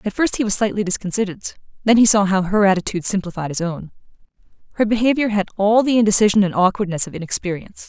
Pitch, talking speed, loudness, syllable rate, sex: 200 Hz, 190 wpm, -18 LUFS, 7.0 syllables/s, female